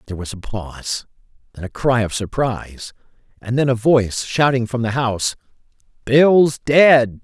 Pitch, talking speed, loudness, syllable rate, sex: 120 Hz, 160 wpm, -17 LUFS, 4.8 syllables/s, male